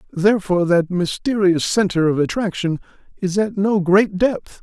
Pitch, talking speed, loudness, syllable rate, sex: 190 Hz, 145 wpm, -18 LUFS, 4.7 syllables/s, male